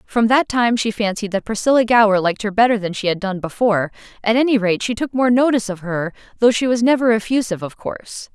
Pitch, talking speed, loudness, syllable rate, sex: 220 Hz, 230 wpm, -18 LUFS, 6.3 syllables/s, female